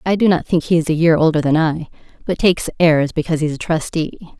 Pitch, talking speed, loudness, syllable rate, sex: 160 Hz, 245 wpm, -17 LUFS, 6.0 syllables/s, female